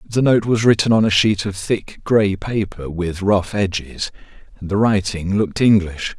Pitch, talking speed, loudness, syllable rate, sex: 100 Hz, 175 wpm, -18 LUFS, 4.3 syllables/s, male